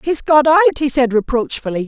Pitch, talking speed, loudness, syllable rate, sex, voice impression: 265 Hz, 190 wpm, -14 LUFS, 5.8 syllables/s, female, very feminine, very middle-aged, very thin, tensed, slightly powerful, bright, slightly soft, clear, fluent, slightly cool, intellectual, refreshing, very sincere, very calm, friendly, very reassuring, slightly unique, slightly elegant, wild, slightly sweet, lively, slightly strict, slightly intense, slightly sharp